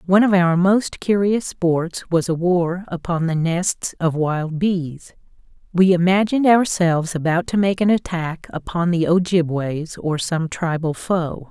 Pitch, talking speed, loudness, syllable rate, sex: 175 Hz, 155 wpm, -19 LUFS, 4.2 syllables/s, female